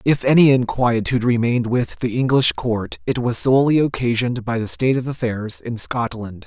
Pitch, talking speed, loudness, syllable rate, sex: 120 Hz, 175 wpm, -19 LUFS, 5.4 syllables/s, male